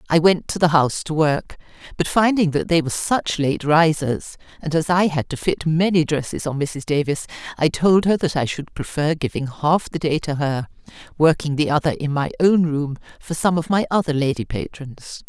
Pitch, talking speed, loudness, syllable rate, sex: 155 Hz, 210 wpm, -20 LUFS, 5.1 syllables/s, female